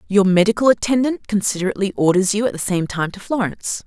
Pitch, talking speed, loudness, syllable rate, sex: 200 Hz, 185 wpm, -18 LUFS, 6.6 syllables/s, female